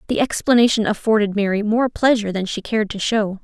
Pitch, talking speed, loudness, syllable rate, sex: 215 Hz, 190 wpm, -18 LUFS, 6.2 syllables/s, female